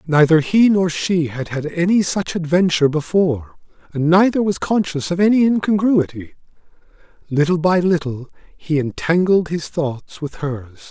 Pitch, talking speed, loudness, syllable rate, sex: 165 Hz, 145 wpm, -17 LUFS, 4.8 syllables/s, male